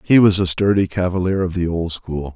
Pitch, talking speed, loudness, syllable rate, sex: 90 Hz, 230 wpm, -18 LUFS, 5.3 syllables/s, male